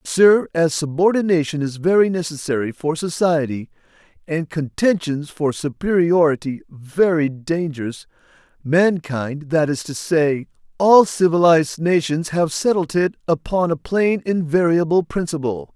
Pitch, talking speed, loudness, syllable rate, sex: 160 Hz, 120 wpm, -19 LUFS, 4.5 syllables/s, male